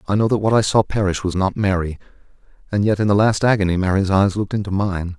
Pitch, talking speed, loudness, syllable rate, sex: 100 Hz, 245 wpm, -18 LUFS, 6.5 syllables/s, male